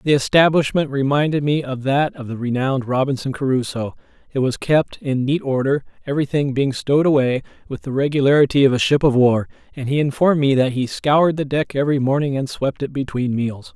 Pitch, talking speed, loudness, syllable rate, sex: 135 Hz, 195 wpm, -19 LUFS, 5.8 syllables/s, male